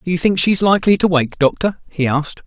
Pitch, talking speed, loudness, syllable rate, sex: 170 Hz, 270 wpm, -16 LUFS, 6.6 syllables/s, male